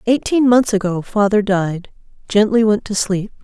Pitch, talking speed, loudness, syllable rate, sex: 210 Hz, 140 wpm, -16 LUFS, 4.5 syllables/s, female